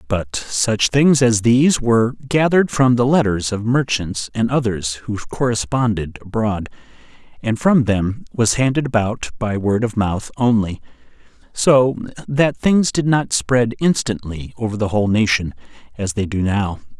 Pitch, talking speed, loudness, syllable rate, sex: 115 Hz, 150 wpm, -18 LUFS, 4.5 syllables/s, male